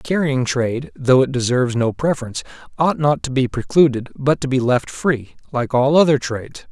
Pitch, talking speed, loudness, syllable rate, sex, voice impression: 135 Hz, 195 wpm, -18 LUFS, 5.4 syllables/s, male, very masculine, adult-like, slightly thick, cool, sincere, slightly calm, slightly elegant